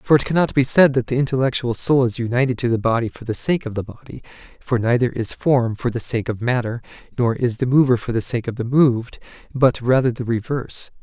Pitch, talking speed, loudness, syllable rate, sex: 125 Hz, 235 wpm, -19 LUFS, 5.9 syllables/s, male